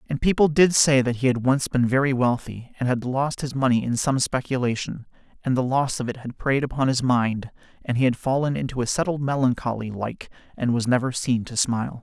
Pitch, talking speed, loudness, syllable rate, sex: 130 Hz, 220 wpm, -23 LUFS, 5.5 syllables/s, male